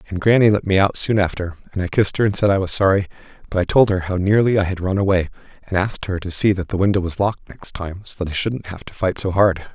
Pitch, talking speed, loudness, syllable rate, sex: 95 Hz, 290 wpm, -19 LUFS, 6.6 syllables/s, male